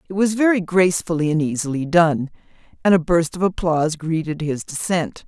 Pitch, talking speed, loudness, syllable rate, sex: 165 Hz, 170 wpm, -19 LUFS, 5.5 syllables/s, female